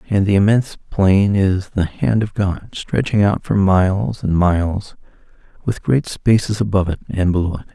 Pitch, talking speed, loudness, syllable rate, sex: 100 Hz, 180 wpm, -17 LUFS, 4.9 syllables/s, male